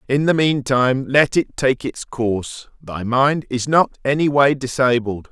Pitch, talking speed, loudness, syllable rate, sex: 130 Hz, 180 wpm, -18 LUFS, 4.1 syllables/s, male